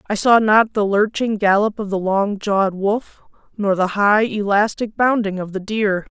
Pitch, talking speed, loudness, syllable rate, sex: 205 Hz, 185 wpm, -18 LUFS, 4.4 syllables/s, female